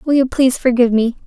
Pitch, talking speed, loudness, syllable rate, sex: 250 Hz, 235 wpm, -15 LUFS, 7.0 syllables/s, female